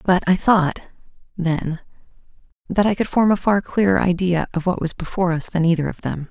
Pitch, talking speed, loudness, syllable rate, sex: 175 Hz, 180 wpm, -20 LUFS, 5.4 syllables/s, female